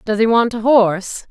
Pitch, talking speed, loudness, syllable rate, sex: 220 Hz, 230 wpm, -15 LUFS, 5.0 syllables/s, female